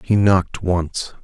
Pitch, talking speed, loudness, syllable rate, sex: 90 Hz, 145 wpm, -19 LUFS, 3.7 syllables/s, male